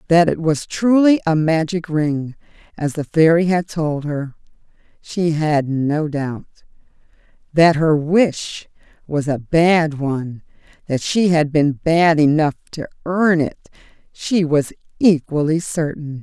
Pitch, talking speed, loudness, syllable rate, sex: 160 Hz, 135 wpm, -18 LUFS, 3.8 syllables/s, female